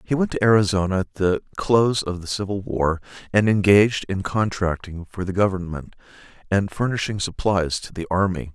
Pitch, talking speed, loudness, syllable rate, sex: 95 Hz, 170 wpm, -22 LUFS, 5.3 syllables/s, male